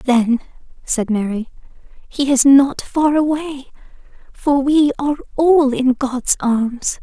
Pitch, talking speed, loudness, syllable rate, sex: 270 Hz, 130 wpm, -16 LUFS, 3.5 syllables/s, female